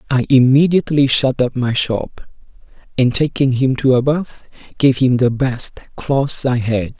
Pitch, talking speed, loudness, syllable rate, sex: 130 Hz, 165 wpm, -15 LUFS, 4.5 syllables/s, male